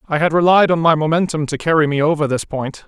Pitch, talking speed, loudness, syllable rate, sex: 155 Hz, 250 wpm, -16 LUFS, 6.4 syllables/s, male